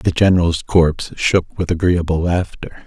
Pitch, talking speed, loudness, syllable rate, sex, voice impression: 85 Hz, 145 wpm, -17 LUFS, 4.7 syllables/s, male, masculine, very adult-like, slightly muffled, slightly sincere, friendly, kind